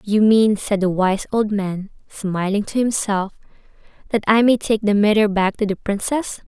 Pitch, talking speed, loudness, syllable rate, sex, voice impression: 205 Hz, 185 wpm, -19 LUFS, 4.5 syllables/s, female, feminine, young, slightly tensed, slightly powerful, soft, slightly halting, cute, calm, friendly, slightly lively, kind, modest